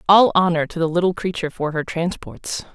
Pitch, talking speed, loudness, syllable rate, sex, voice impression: 175 Hz, 195 wpm, -20 LUFS, 5.6 syllables/s, female, feminine, gender-neutral, slightly young, slightly adult-like, slightly thin, slightly tensed, slightly weak, bright, hard, slightly clear, slightly fluent, slightly raspy, cool, very intellectual, refreshing, sincere, calm, friendly, reassuring, very unique, elegant, slightly wild, sweet, kind, slightly modest